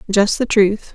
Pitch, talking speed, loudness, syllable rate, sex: 205 Hz, 190 wpm, -16 LUFS, 3.9 syllables/s, female